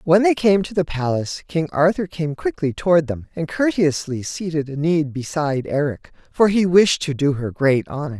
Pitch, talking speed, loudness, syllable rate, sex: 160 Hz, 190 wpm, -20 LUFS, 5.3 syllables/s, female